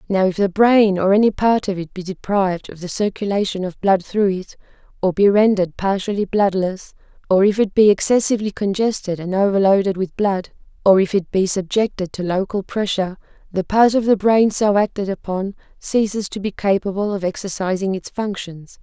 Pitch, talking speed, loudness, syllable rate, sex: 195 Hz, 180 wpm, -18 LUFS, 5.4 syllables/s, female